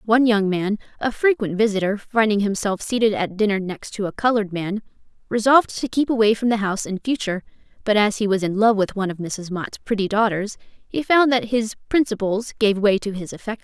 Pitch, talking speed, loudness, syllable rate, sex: 210 Hz, 210 wpm, -21 LUFS, 5.8 syllables/s, female